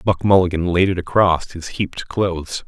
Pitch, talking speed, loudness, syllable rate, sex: 90 Hz, 180 wpm, -18 LUFS, 5.1 syllables/s, male